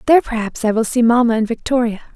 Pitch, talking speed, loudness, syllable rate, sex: 235 Hz, 225 wpm, -16 LUFS, 6.9 syllables/s, female